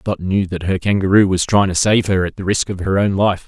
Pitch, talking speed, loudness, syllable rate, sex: 95 Hz, 295 wpm, -16 LUFS, 5.6 syllables/s, male